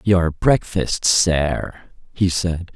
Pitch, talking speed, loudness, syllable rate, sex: 85 Hz, 110 wpm, -19 LUFS, 2.5 syllables/s, male